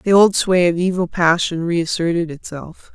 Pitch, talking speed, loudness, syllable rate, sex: 175 Hz, 165 wpm, -17 LUFS, 4.5 syllables/s, female